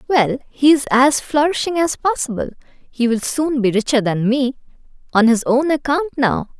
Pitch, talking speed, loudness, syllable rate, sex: 265 Hz, 165 wpm, -17 LUFS, 4.3 syllables/s, female